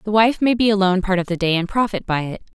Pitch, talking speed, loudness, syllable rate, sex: 195 Hz, 300 wpm, -18 LUFS, 6.9 syllables/s, female